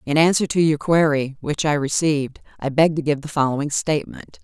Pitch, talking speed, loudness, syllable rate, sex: 150 Hz, 205 wpm, -20 LUFS, 5.6 syllables/s, female